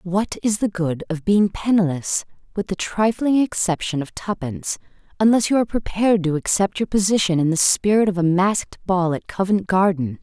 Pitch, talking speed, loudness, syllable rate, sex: 190 Hz, 170 wpm, -20 LUFS, 5.3 syllables/s, female